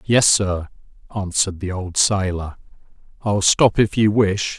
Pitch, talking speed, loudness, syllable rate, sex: 100 Hz, 145 wpm, -19 LUFS, 4.1 syllables/s, male